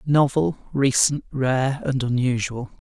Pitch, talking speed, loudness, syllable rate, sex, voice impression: 135 Hz, 105 wpm, -22 LUFS, 3.8 syllables/s, male, very feminine, slightly old, very thin, relaxed, weak, slightly dark, very soft, very muffled, halting, raspy, intellectual, slightly refreshing, very sincere, very calm, very mature, slightly friendly, slightly reassuring, very unique, very elegant, slightly sweet, slightly lively, very kind, very modest, very light